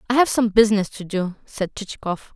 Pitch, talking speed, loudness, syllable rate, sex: 210 Hz, 205 wpm, -21 LUFS, 5.8 syllables/s, female